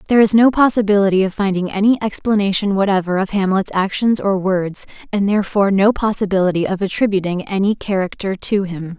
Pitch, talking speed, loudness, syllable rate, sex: 195 Hz, 160 wpm, -17 LUFS, 6.0 syllables/s, female